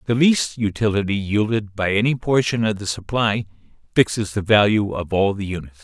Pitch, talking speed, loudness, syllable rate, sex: 105 Hz, 175 wpm, -20 LUFS, 5.3 syllables/s, male